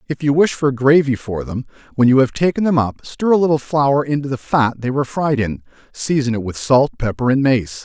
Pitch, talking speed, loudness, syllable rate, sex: 135 Hz, 235 wpm, -17 LUFS, 5.4 syllables/s, male